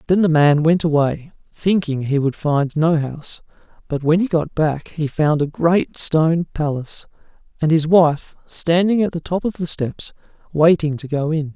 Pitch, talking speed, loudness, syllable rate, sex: 160 Hz, 185 wpm, -18 LUFS, 4.6 syllables/s, male